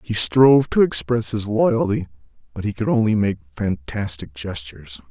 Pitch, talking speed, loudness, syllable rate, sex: 100 Hz, 155 wpm, -20 LUFS, 4.9 syllables/s, male